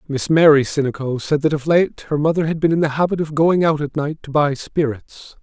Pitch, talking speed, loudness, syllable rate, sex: 150 Hz, 245 wpm, -18 LUFS, 5.4 syllables/s, male